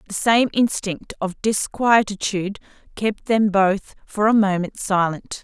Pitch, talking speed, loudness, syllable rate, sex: 205 Hz, 130 wpm, -20 LUFS, 3.9 syllables/s, female